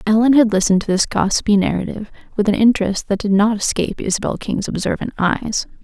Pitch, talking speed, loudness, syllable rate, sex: 210 Hz, 185 wpm, -17 LUFS, 6.4 syllables/s, female